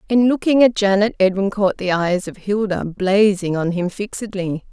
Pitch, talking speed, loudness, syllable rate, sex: 200 Hz, 180 wpm, -18 LUFS, 4.7 syllables/s, female